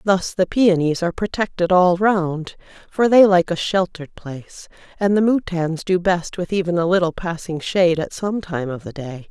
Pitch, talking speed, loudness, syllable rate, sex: 180 Hz, 195 wpm, -19 LUFS, 5.0 syllables/s, female